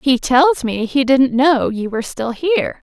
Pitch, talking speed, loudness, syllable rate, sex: 265 Hz, 205 wpm, -16 LUFS, 4.4 syllables/s, female